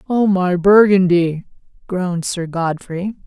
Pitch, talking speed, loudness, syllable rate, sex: 185 Hz, 110 wpm, -16 LUFS, 3.9 syllables/s, female